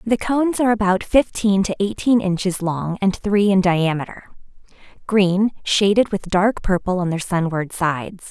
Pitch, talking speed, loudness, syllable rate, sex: 195 Hz, 160 wpm, -19 LUFS, 4.7 syllables/s, female